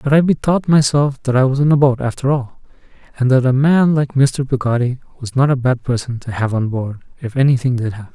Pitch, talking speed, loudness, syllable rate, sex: 130 Hz, 235 wpm, -16 LUFS, 5.8 syllables/s, male